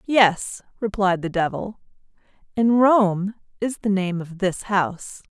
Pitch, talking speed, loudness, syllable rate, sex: 200 Hz, 135 wpm, -22 LUFS, 3.8 syllables/s, female